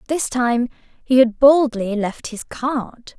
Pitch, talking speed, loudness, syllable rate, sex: 250 Hz, 150 wpm, -18 LUFS, 3.4 syllables/s, female